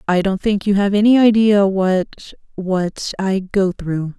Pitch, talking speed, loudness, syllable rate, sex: 195 Hz, 160 wpm, -16 LUFS, 3.7 syllables/s, female